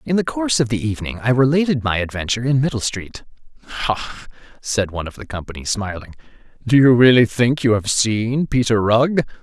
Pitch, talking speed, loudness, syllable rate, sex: 120 Hz, 185 wpm, -18 LUFS, 5.8 syllables/s, male